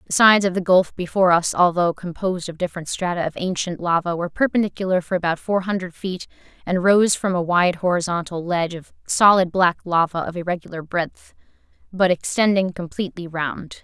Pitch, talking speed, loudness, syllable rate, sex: 180 Hz, 175 wpm, -20 LUFS, 5.8 syllables/s, female